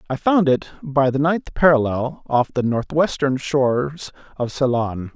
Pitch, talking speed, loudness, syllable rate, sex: 140 Hz, 150 wpm, -20 LUFS, 4.2 syllables/s, male